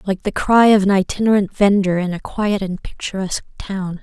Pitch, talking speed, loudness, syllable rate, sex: 195 Hz, 195 wpm, -17 LUFS, 5.3 syllables/s, female